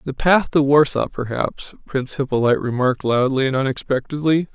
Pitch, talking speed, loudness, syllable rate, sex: 135 Hz, 145 wpm, -19 LUFS, 5.6 syllables/s, male